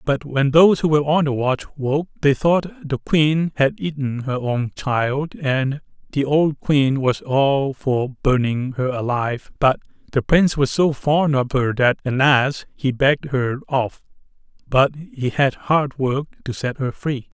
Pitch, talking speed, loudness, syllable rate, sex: 140 Hz, 180 wpm, -19 LUFS, 4.0 syllables/s, male